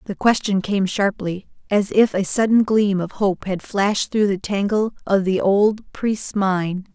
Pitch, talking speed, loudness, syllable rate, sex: 200 Hz, 180 wpm, -20 LUFS, 4.1 syllables/s, female